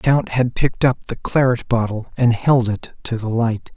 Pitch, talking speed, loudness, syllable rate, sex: 120 Hz, 225 wpm, -19 LUFS, 4.7 syllables/s, male